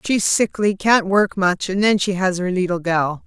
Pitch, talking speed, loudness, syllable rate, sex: 190 Hz, 185 wpm, -18 LUFS, 4.4 syllables/s, female